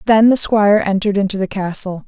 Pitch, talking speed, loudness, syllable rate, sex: 205 Hz, 205 wpm, -15 LUFS, 6.3 syllables/s, female